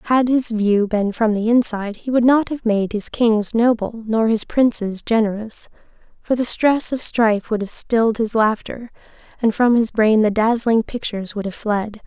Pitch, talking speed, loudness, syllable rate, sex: 225 Hz, 195 wpm, -18 LUFS, 4.7 syllables/s, female